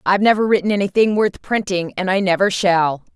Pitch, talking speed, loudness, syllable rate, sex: 195 Hz, 190 wpm, -17 LUFS, 5.8 syllables/s, female